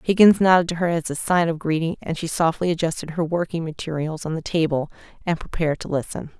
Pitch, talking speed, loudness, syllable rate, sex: 165 Hz, 215 wpm, -22 LUFS, 6.2 syllables/s, female